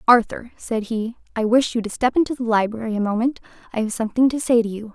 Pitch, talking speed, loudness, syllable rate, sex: 230 Hz, 245 wpm, -21 LUFS, 6.3 syllables/s, female